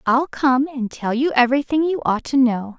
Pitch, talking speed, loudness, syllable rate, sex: 265 Hz, 215 wpm, -19 LUFS, 4.9 syllables/s, female